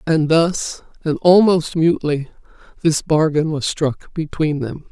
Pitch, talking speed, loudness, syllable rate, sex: 155 Hz, 135 wpm, -18 LUFS, 4.0 syllables/s, female